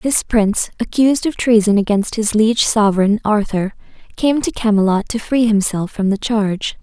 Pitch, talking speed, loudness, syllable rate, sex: 215 Hz, 165 wpm, -16 LUFS, 5.2 syllables/s, female